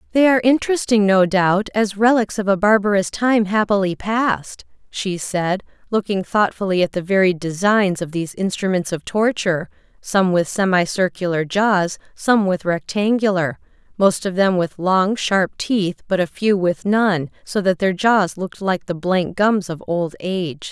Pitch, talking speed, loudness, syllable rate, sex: 195 Hz, 160 wpm, -18 LUFS, 4.5 syllables/s, female